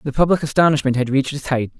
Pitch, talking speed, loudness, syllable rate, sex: 140 Hz, 235 wpm, -18 LUFS, 7.3 syllables/s, male